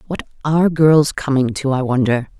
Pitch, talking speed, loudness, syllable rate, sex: 140 Hz, 175 wpm, -16 LUFS, 5.1 syllables/s, female